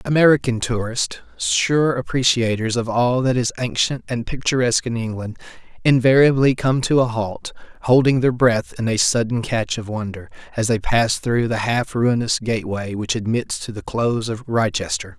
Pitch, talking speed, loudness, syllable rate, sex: 120 Hz, 165 wpm, -19 LUFS, 4.9 syllables/s, male